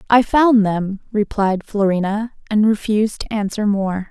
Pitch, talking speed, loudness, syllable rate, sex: 210 Hz, 145 wpm, -18 LUFS, 4.4 syllables/s, female